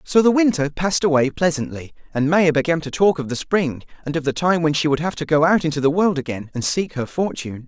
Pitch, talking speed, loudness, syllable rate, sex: 160 Hz, 260 wpm, -19 LUFS, 6.0 syllables/s, male